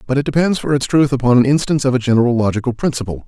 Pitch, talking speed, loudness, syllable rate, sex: 130 Hz, 255 wpm, -16 LUFS, 7.7 syllables/s, male